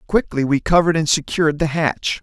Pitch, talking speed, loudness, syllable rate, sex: 160 Hz, 190 wpm, -18 LUFS, 5.8 syllables/s, male